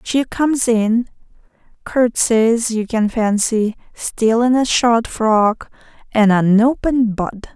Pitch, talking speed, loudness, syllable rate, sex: 230 Hz, 110 wpm, -16 LUFS, 3.5 syllables/s, female